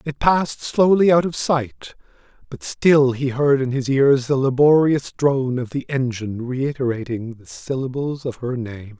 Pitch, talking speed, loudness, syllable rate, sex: 135 Hz, 165 wpm, -19 LUFS, 4.4 syllables/s, male